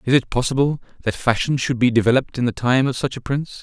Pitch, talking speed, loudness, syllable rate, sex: 125 Hz, 250 wpm, -20 LUFS, 6.7 syllables/s, male